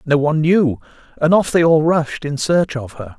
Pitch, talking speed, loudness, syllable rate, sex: 155 Hz, 225 wpm, -16 LUFS, 4.9 syllables/s, male